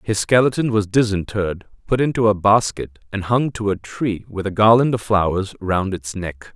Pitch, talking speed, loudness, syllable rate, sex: 105 Hz, 190 wpm, -19 LUFS, 5.0 syllables/s, male